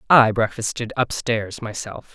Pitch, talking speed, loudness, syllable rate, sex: 115 Hz, 110 wpm, -21 LUFS, 4.2 syllables/s, male